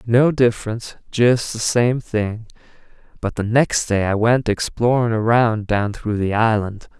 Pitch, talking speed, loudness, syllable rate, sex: 115 Hz, 155 wpm, -19 LUFS, 4.2 syllables/s, male